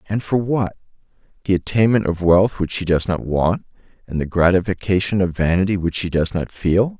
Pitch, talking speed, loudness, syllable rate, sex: 95 Hz, 180 wpm, -19 LUFS, 5.3 syllables/s, male